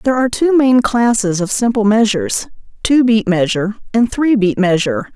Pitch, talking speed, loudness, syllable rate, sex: 220 Hz, 175 wpm, -14 LUFS, 5.6 syllables/s, female